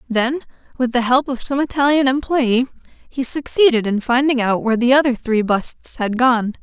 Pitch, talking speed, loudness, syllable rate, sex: 250 Hz, 180 wpm, -17 LUFS, 4.9 syllables/s, female